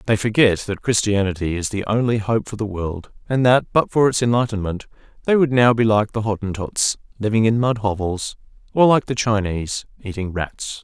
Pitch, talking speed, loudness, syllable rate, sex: 110 Hz, 190 wpm, -19 LUFS, 5.3 syllables/s, male